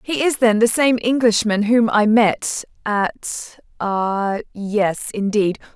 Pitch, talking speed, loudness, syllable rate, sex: 220 Hz, 105 wpm, -18 LUFS, 3.2 syllables/s, female